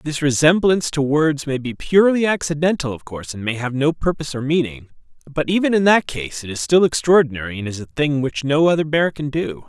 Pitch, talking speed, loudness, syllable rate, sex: 145 Hz, 225 wpm, -18 LUFS, 5.8 syllables/s, male